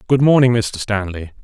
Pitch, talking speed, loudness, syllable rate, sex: 110 Hz, 170 wpm, -16 LUFS, 5.0 syllables/s, male